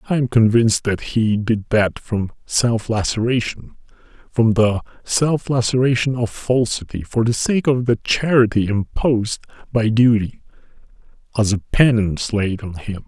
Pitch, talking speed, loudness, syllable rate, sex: 115 Hz, 140 wpm, -18 LUFS, 4.5 syllables/s, male